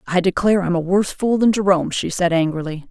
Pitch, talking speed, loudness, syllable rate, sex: 185 Hz, 225 wpm, -18 LUFS, 6.5 syllables/s, female